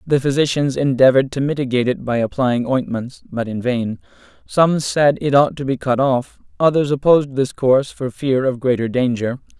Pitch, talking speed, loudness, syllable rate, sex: 130 Hz, 180 wpm, -18 LUFS, 5.3 syllables/s, male